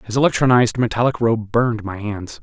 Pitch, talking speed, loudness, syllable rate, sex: 115 Hz, 175 wpm, -18 LUFS, 6.1 syllables/s, male